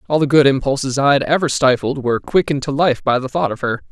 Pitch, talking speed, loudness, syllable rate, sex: 135 Hz, 260 wpm, -16 LUFS, 6.5 syllables/s, male